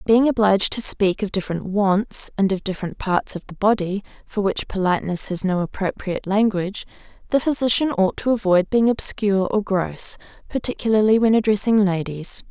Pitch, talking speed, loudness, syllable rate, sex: 200 Hz, 165 wpm, -20 LUFS, 5.4 syllables/s, female